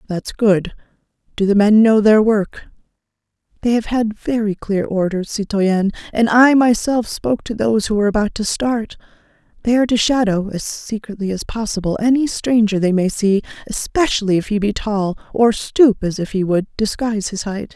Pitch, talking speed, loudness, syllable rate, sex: 215 Hz, 170 wpm, -17 LUFS, 5.1 syllables/s, female